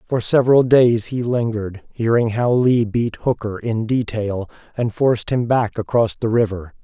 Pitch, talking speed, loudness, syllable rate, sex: 115 Hz, 165 wpm, -18 LUFS, 4.6 syllables/s, male